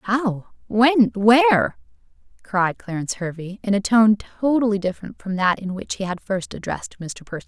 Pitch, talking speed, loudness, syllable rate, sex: 205 Hz, 150 wpm, -20 LUFS, 5.3 syllables/s, female